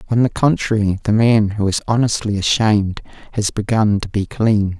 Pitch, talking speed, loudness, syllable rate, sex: 105 Hz, 175 wpm, -17 LUFS, 5.1 syllables/s, male